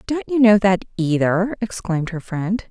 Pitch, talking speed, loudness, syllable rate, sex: 200 Hz, 175 wpm, -19 LUFS, 4.8 syllables/s, female